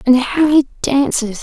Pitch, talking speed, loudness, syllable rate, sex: 265 Hz, 170 wpm, -14 LUFS, 4.3 syllables/s, female